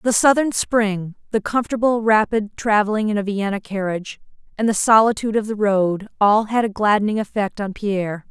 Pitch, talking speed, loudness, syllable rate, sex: 210 Hz, 175 wpm, -19 LUFS, 5.4 syllables/s, female